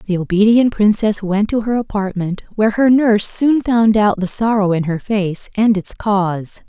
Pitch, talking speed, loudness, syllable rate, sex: 210 Hz, 190 wpm, -16 LUFS, 4.7 syllables/s, female